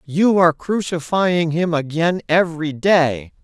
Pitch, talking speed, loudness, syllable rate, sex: 165 Hz, 120 wpm, -18 LUFS, 4.1 syllables/s, male